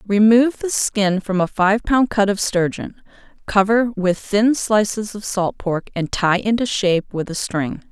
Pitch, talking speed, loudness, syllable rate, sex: 205 Hz, 180 wpm, -18 LUFS, 4.3 syllables/s, female